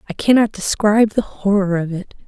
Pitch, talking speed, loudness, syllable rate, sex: 200 Hz, 185 wpm, -17 LUFS, 5.6 syllables/s, female